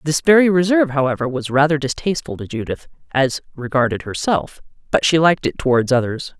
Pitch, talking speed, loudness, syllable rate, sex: 145 Hz, 170 wpm, -18 LUFS, 6.1 syllables/s, female